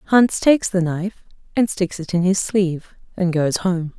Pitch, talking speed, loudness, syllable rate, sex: 185 Hz, 195 wpm, -19 LUFS, 4.6 syllables/s, female